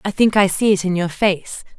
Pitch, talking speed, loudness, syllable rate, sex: 185 Hz, 270 wpm, -17 LUFS, 5.1 syllables/s, female